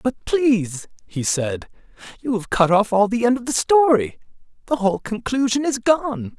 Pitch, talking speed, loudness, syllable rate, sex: 215 Hz, 180 wpm, -19 LUFS, 4.8 syllables/s, male